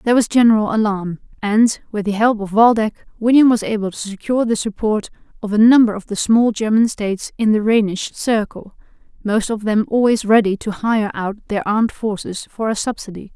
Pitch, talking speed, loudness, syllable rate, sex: 215 Hz, 195 wpm, -17 LUFS, 5.5 syllables/s, female